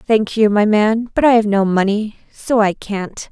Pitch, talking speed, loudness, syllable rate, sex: 215 Hz, 215 wpm, -15 LUFS, 4.2 syllables/s, female